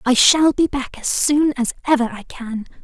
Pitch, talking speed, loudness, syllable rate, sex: 265 Hz, 210 wpm, -18 LUFS, 4.6 syllables/s, female